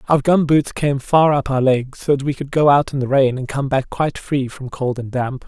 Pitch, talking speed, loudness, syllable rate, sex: 135 Hz, 285 wpm, -18 LUFS, 5.1 syllables/s, male